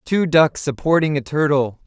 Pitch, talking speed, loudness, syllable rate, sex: 150 Hz, 160 wpm, -18 LUFS, 4.5 syllables/s, male